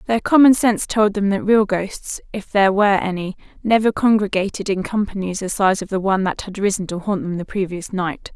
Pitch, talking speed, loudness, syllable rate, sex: 200 Hz, 215 wpm, -19 LUFS, 5.6 syllables/s, female